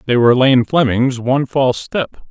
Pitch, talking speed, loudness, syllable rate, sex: 130 Hz, 180 wpm, -15 LUFS, 5.4 syllables/s, male